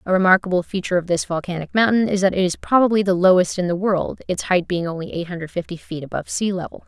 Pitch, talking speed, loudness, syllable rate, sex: 185 Hz, 245 wpm, -20 LUFS, 6.7 syllables/s, female